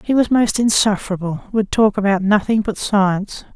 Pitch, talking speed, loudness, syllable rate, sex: 205 Hz, 170 wpm, -17 LUFS, 5.2 syllables/s, female